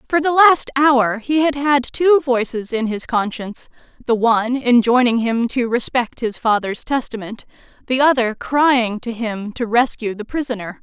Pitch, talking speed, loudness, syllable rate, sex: 245 Hz, 165 wpm, -17 LUFS, 4.5 syllables/s, female